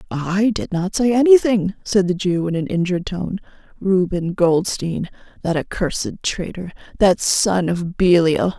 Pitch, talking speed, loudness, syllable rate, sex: 185 Hz, 145 wpm, -19 LUFS, 4.3 syllables/s, female